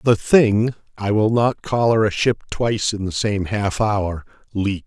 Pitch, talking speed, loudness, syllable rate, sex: 105 Hz, 195 wpm, -19 LUFS, 2.9 syllables/s, male